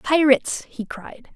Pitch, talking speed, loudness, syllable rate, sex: 265 Hz, 135 wpm, -20 LUFS, 4.1 syllables/s, female